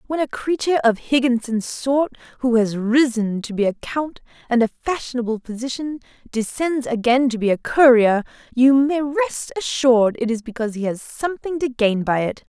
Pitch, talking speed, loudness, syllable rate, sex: 250 Hz, 175 wpm, -20 LUFS, 5.1 syllables/s, female